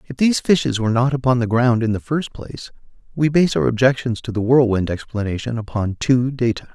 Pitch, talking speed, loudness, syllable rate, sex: 120 Hz, 205 wpm, -19 LUFS, 5.9 syllables/s, male